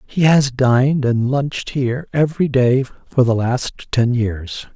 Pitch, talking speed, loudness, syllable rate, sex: 130 Hz, 165 wpm, -17 LUFS, 4.2 syllables/s, male